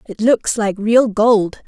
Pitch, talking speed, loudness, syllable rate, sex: 215 Hz, 180 wpm, -15 LUFS, 3.2 syllables/s, female